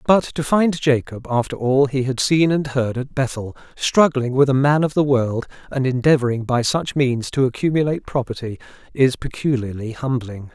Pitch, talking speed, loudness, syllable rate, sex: 130 Hz, 175 wpm, -19 LUFS, 5.0 syllables/s, male